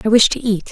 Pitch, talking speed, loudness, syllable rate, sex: 225 Hz, 340 wpm, -15 LUFS, 6.6 syllables/s, female